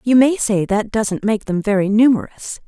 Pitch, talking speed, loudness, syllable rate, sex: 220 Hz, 200 wpm, -17 LUFS, 4.7 syllables/s, female